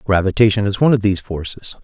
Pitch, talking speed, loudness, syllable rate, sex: 100 Hz, 195 wpm, -17 LUFS, 6.9 syllables/s, male